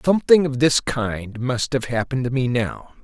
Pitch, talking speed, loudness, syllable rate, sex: 130 Hz, 195 wpm, -20 LUFS, 4.9 syllables/s, male